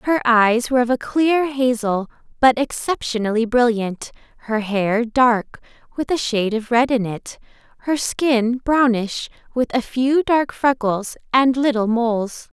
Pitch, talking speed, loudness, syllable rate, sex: 240 Hz, 150 wpm, -19 LUFS, 4.1 syllables/s, female